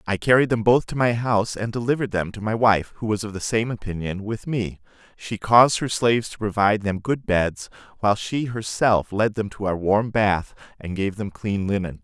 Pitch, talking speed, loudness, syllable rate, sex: 105 Hz, 220 wpm, -22 LUFS, 5.2 syllables/s, male